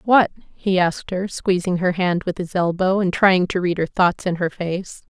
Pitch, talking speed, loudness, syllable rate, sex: 185 Hz, 220 wpm, -20 LUFS, 4.7 syllables/s, female